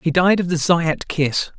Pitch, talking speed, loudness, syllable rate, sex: 165 Hz, 230 wpm, -18 LUFS, 4.0 syllables/s, male